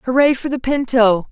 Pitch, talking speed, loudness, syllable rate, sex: 250 Hz, 185 wpm, -16 LUFS, 4.8 syllables/s, female